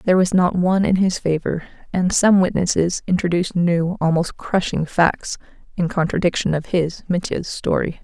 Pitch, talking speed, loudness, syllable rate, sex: 175 Hz, 155 wpm, -19 LUFS, 5.1 syllables/s, female